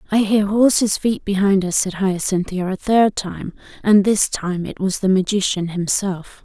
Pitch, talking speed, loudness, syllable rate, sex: 195 Hz, 175 wpm, -18 LUFS, 4.4 syllables/s, female